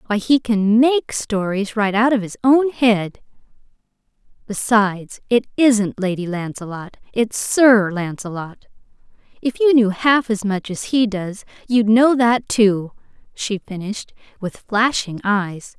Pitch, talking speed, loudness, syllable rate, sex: 215 Hz, 135 wpm, -18 LUFS, 3.9 syllables/s, female